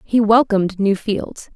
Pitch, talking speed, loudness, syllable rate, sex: 210 Hz, 155 wpm, -17 LUFS, 4.2 syllables/s, female